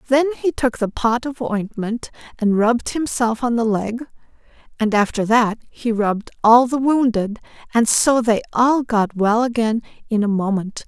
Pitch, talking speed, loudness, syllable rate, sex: 230 Hz, 170 wpm, -19 LUFS, 4.5 syllables/s, female